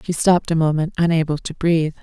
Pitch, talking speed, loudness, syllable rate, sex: 165 Hz, 205 wpm, -19 LUFS, 6.5 syllables/s, female